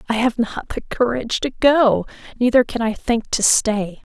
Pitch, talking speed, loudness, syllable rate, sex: 235 Hz, 190 wpm, -18 LUFS, 4.8 syllables/s, female